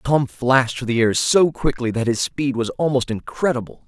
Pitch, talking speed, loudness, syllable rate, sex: 125 Hz, 200 wpm, -20 LUFS, 5.0 syllables/s, male